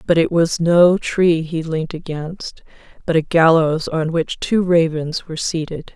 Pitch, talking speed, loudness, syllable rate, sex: 165 Hz, 170 wpm, -17 LUFS, 4.1 syllables/s, female